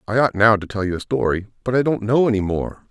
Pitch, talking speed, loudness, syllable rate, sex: 110 Hz, 290 wpm, -19 LUFS, 6.2 syllables/s, male